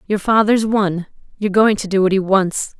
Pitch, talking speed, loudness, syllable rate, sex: 200 Hz, 195 wpm, -16 LUFS, 5.2 syllables/s, female